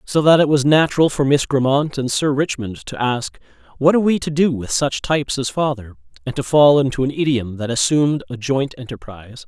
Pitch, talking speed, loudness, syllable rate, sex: 135 Hz, 215 wpm, -18 LUFS, 5.6 syllables/s, male